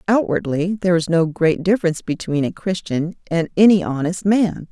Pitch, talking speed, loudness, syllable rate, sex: 175 Hz, 165 wpm, -19 LUFS, 5.3 syllables/s, female